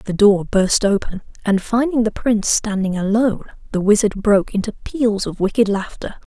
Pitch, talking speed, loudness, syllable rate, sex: 210 Hz, 170 wpm, -18 LUFS, 5.1 syllables/s, female